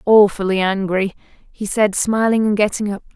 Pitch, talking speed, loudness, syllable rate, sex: 205 Hz, 150 wpm, -17 LUFS, 4.8 syllables/s, female